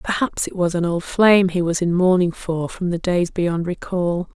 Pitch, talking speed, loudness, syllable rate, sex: 175 Hz, 220 wpm, -19 LUFS, 4.7 syllables/s, female